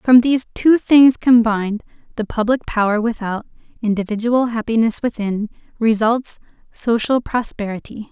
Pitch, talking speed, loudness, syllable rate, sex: 230 Hz, 110 wpm, -17 LUFS, 4.7 syllables/s, female